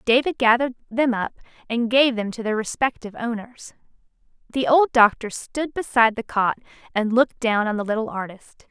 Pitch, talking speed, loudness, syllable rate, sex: 235 Hz, 170 wpm, -21 LUFS, 5.5 syllables/s, female